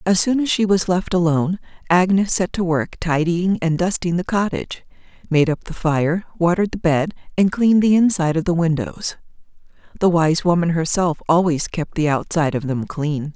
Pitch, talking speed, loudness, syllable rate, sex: 170 Hz, 185 wpm, -19 LUFS, 5.2 syllables/s, female